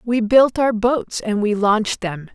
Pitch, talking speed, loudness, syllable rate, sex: 220 Hz, 205 wpm, -18 LUFS, 4.0 syllables/s, female